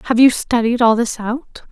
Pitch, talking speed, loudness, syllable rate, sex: 235 Hz, 210 wpm, -15 LUFS, 4.8 syllables/s, female